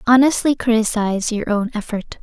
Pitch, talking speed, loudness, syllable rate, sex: 225 Hz, 135 wpm, -18 LUFS, 5.4 syllables/s, female